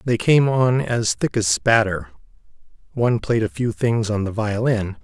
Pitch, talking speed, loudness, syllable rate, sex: 115 Hz, 180 wpm, -20 LUFS, 4.5 syllables/s, male